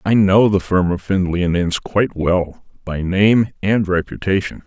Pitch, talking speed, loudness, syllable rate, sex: 95 Hz, 180 wpm, -17 LUFS, 4.5 syllables/s, male